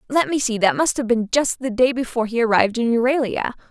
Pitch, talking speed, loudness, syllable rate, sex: 240 Hz, 245 wpm, -19 LUFS, 6.3 syllables/s, female